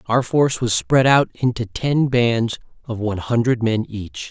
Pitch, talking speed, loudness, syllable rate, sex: 120 Hz, 195 wpm, -19 LUFS, 4.5 syllables/s, male